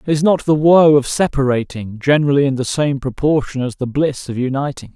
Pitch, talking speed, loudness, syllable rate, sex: 140 Hz, 195 wpm, -16 LUFS, 5.4 syllables/s, male